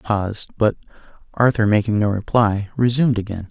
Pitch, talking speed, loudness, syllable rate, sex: 110 Hz, 155 wpm, -19 LUFS, 6.1 syllables/s, male